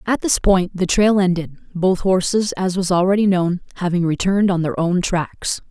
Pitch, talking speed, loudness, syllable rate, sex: 185 Hz, 180 wpm, -18 LUFS, 4.8 syllables/s, female